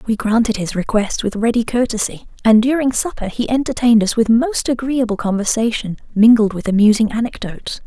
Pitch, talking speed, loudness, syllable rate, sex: 225 Hz, 160 wpm, -16 LUFS, 5.7 syllables/s, female